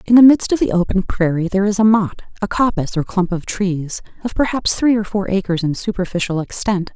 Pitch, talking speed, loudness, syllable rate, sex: 200 Hz, 205 wpm, -17 LUFS, 5.9 syllables/s, female